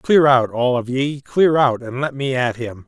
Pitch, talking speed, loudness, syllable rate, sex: 130 Hz, 230 wpm, -18 LUFS, 4.2 syllables/s, male